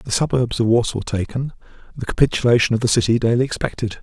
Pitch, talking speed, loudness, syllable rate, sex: 115 Hz, 180 wpm, -19 LUFS, 6.5 syllables/s, male